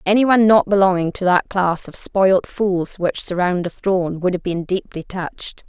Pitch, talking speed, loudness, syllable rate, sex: 185 Hz, 190 wpm, -18 LUFS, 4.9 syllables/s, female